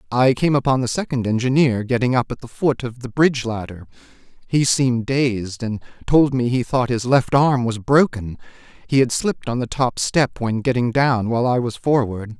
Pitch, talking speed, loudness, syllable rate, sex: 125 Hz, 205 wpm, -19 LUFS, 5.1 syllables/s, male